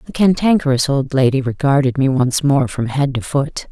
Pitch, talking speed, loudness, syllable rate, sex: 140 Hz, 195 wpm, -16 LUFS, 5.1 syllables/s, female